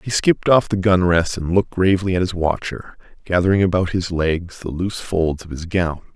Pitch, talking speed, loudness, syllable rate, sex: 90 Hz, 205 wpm, -19 LUFS, 5.5 syllables/s, male